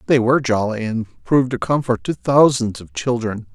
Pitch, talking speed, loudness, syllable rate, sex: 120 Hz, 185 wpm, -18 LUFS, 5.1 syllables/s, male